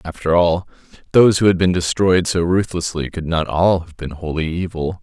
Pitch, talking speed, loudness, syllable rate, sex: 85 Hz, 190 wpm, -17 LUFS, 5.2 syllables/s, male